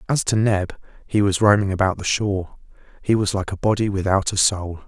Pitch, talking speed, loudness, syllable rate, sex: 100 Hz, 210 wpm, -20 LUFS, 5.6 syllables/s, male